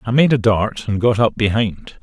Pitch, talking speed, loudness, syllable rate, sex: 110 Hz, 235 wpm, -17 LUFS, 4.7 syllables/s, male